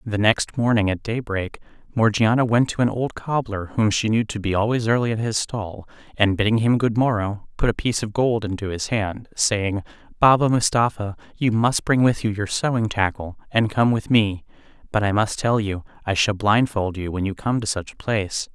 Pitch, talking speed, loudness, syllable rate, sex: 110 Hz, 210 wpm, -21 LUFS, 5.1 syllables/s, male